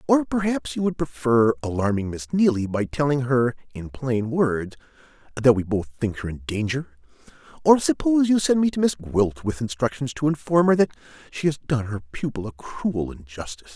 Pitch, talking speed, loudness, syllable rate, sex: 130 Hz, 190 wpm, -23 LUFS, 5.1 syllables/s, male